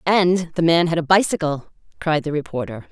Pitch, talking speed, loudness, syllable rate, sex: 160 Hz, 185 wpm, -19 LUFS, 5.3 syllables/s, female